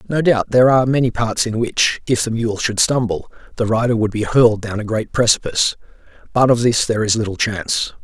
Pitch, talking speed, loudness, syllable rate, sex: 115 Hz, 215 wpm, -17 LUFS, 6.0 syllables/s, male